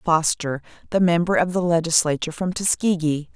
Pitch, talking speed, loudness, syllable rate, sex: 170 Hz, 145 wpm, -21 LUFS, 5.4 syllables/s, female